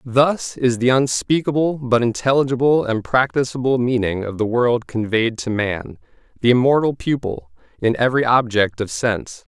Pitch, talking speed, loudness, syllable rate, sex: 120 Hz, 145 wpm, -19 LUFS, 4.9 syllables/s, male